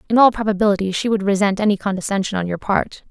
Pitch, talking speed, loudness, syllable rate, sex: 200 Hz, 215 wpm, -18 LUFS, 6.9 syllables/s, female